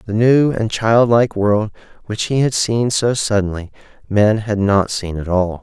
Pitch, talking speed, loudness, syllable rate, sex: 110 Hz, 180 wpm, -16 LUFS, 4.4 syllables/s, male